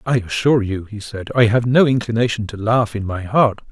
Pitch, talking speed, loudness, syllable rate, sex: 110 Hz, 225 wpm, -18 LUFS, 5.4 syllables/s, male